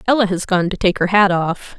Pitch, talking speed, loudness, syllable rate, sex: 190 Hz, 270 wpm, -16 LUFS, 5.5 syllables/s, female